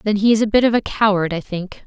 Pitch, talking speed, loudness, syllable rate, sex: 205 Hz, 320 wpm, -17 LUFS, 6.3 syllables/s, female